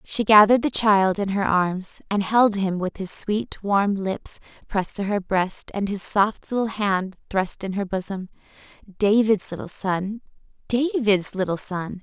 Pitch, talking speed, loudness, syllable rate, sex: 200 Hz, 165 wpm, -22 LUFS, 4.1 syllables/s, female